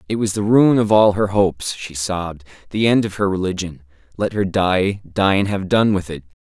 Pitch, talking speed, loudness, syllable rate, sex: 95 Hz, 225 wpm, -18 LUFS, 5.1 syllables/s, male